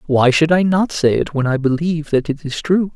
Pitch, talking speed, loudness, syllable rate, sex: 155 Hz, 265 wpm, -16 LUFS, 5.4 syllables/s, male